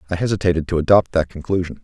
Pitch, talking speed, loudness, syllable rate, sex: 90 Hz, 195 wpm, -19 LUFS, 7.4 syllables/s, male